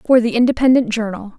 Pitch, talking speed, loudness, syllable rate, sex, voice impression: 230 Hz, 175 wpm, -16 LUFS, 6.4 syllables/s, female, feminine, slightly adult-like, slightly cute, calm, slightly friendly, slightly sweet